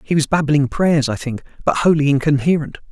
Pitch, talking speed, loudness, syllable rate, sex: 150 Hz, 165 wpm, -17 LUFS, 5.6 syllables/s, male